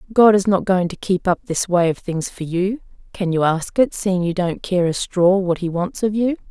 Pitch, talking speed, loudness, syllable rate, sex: 185 Hz, 260 wpm, -19 LUFS, 4.8 syllables/s, female